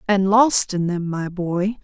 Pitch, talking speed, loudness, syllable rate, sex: 190 Hz, 195 wpm, -19 LUFS, 3.6 syllables/s, female